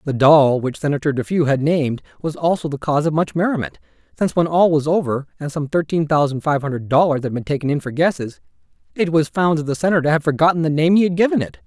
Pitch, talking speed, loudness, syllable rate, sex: 150 Hz, 235 wpm, -18 LUFS, 6.5 syllables/s, male